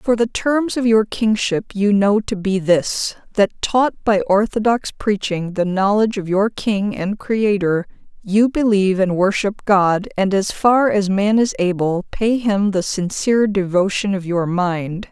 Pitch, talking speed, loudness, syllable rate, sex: 200 Hz, 170 wpm, -18 LUFS, 4.1 syllables/s, female